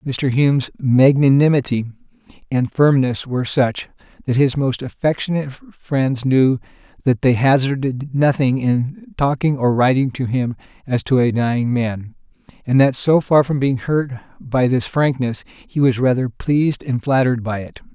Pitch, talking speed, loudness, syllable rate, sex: 130 Hz, 155 wpm, -18 LUFS, 4.6 syllables/s, male